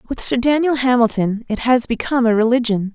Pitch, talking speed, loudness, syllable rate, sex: 240 Hz, 185 wpm, -17 LUFS, 5.6 syllables/s, female